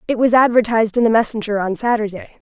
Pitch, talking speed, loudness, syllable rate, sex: 225 Hz, 190 wpm, -16 LUFS, 6.6 syllables/s, female